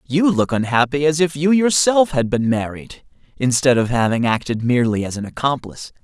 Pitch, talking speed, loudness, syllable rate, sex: 135 Hz, 180 wpm, -18 LUFS, 5.5 syllables/s, male